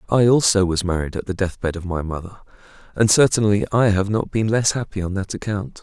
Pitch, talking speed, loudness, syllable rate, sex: 100 Hz, 225 wpm, -20 LUFS, 5.8 syllables/s, male